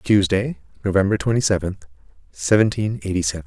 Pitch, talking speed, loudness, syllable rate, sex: 90 Hz, 120 wpm, -20 LUFS, 5.9 syllables/s, male